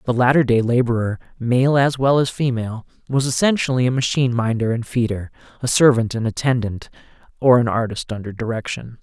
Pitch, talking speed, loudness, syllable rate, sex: 120 Hz, 165 wpm, -19 LUFS, 5.7 syllables/s, male